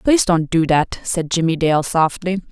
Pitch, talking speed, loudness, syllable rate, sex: 170 Hz, 190 wpm, -17 LUFS, 4.7 syllables/s, female